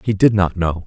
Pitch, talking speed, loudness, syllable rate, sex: 95 Hz, 280 wpm, -17 LUFS, 5.2 syllables/s, male